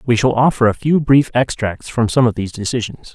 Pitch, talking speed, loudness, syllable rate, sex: 120 Hz, 230 wpm, -16 LUFS, 5.7 syllables/s, male